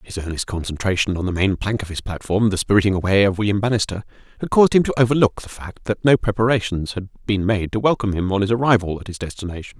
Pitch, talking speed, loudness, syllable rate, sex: 100 Hz, 235 wpm, -20 LUFS, 6.8 syllables/s, male